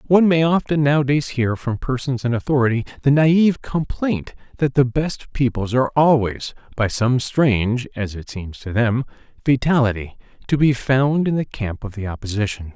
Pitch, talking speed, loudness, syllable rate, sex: 130 Hz, 160 wpm, -19 LUFS, 5.0 syllables/s, male